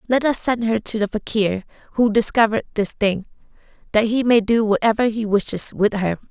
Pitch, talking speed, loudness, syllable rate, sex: 220 Hz, 190 wpm, -19 LUFS, 5.5 syllables/s, female